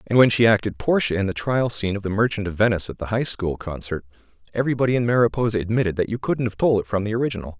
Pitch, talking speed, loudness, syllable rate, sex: 110 Hz, 255 wpm, -22 LUFS, 7.3 syllables/s, male